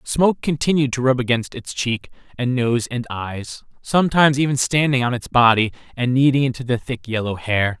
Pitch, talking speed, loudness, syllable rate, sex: 125 Hz, 185 wpm, -19 LUFS, 5.3 syllables/s, male